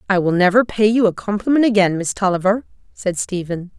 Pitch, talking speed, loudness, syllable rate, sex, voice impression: 200 Hz, 190 wpm, -17 LUFS, 5.8 syllables/s, female, very feminine, slightly middle-aged, thin, very tensed, very powerful, bright, very hard, very clear, very fluent, raspy, slightly cool, slightly intellectual, very refreshing, sincere, slightly calm, slightly friendly, slightly reassuring, very unique, slightly elegant, very wild, very lively, very strict, very intense, very sharp, light